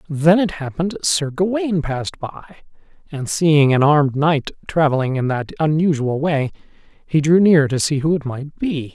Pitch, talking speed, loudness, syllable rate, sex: 150 Hz, 175 wpm, -18 LUFS, 4.7 syllables/s, male